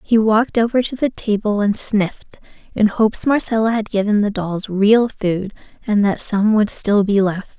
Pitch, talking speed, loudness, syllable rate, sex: 210 Hz, 190 wpm, -17 LUFS, 4.7 syllables/s, female